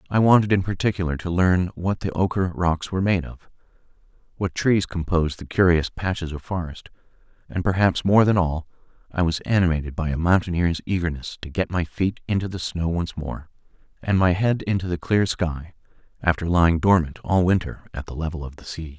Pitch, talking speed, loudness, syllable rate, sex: 90 Hz, 190 wpm, -22 LUFS, 5.5 syllables/s, male